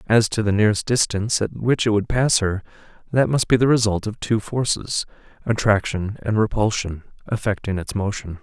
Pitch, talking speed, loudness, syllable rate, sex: 105 Hz, 180 wpm, -21 LUFS, 5.3 syllables/s, male